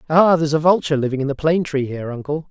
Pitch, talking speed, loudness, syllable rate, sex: 150 Hz, 265 wpm, -18 LUFS, 7.8 syllables/s, male